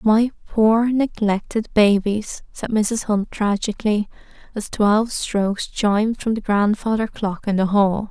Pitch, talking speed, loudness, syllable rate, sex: 210 Hz, 140 wpm, -20 LUFS, 4.1 syllables/s, female